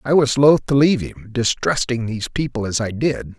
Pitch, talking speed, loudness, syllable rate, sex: 125 Hz, 215 wpm, -19 LUFS, 5.2 syllables/s, male